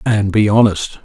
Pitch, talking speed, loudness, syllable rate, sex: 105 Hz, 175 wpm, -14 LUFS, 4.4 syllables/s, male